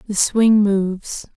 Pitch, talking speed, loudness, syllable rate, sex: 205 Hz, 130 wpm, -16 LUFS, 3.5 syllables/s, female